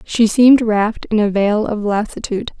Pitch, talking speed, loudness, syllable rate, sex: 215 Hz, 185 wpm, -15 LUFS, 5.4 syllables/s, female